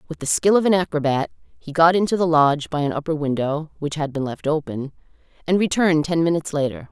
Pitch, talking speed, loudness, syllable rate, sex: 155 Hz, 215 wpm, -20 LUFS, 6.2 syllables/s, female